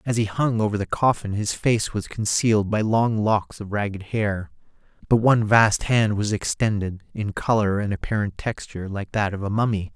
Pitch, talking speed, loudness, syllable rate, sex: 105 Hz, 195 wpm, -22 LUFS, 5.0 syllables/s, male